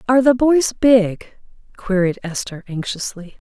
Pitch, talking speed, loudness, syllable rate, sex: 215 Hz, 120 wpm, -18 LUFS, 4.4 syllables/s, female